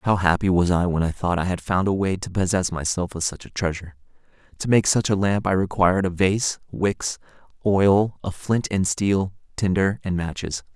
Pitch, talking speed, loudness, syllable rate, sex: 95 Hz, 205 wpm, -22 LUFS, 5.1 syllables/s, male